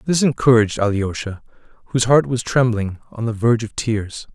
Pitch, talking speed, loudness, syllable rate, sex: 115 Hz, 165 wpm, -19 LUFS, 5.7 syllables/s, male